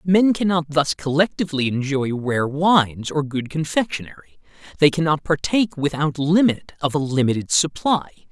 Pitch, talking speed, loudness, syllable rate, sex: 150 Hz, 135 wpm, -20 LUFS, 5.0 syllables/s, male